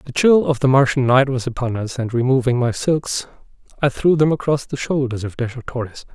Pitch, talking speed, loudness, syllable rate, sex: 130 Hz, 215 wpm, -18 LUFS, 5.4 syllables/s, male